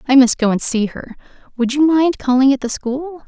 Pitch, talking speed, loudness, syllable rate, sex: 265 Hz, 240 wpm, -16 LUFS, 5.3 syllables/s, female